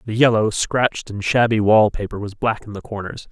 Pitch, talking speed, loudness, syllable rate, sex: 110 Hz, 215 wpm, -19 LUFS, 5.4 syllables/s, male